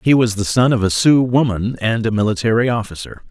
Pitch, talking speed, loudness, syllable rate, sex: 115 Hz, 220 wpm, -16 LUFS, 5.7 syllables/s, male